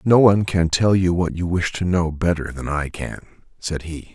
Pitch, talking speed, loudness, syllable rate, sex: 85 Hz, 230 wpm, -20 LUFS, 4.9 syllables/s, male